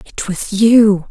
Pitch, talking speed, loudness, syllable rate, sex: 205 Hz, 165 wpm, -13 LUFS, 3.0 syllables/s, female